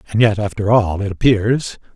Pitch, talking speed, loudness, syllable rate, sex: 105 Hz, 185 wpm, -16 LUFS, 5.1 syllables/s, male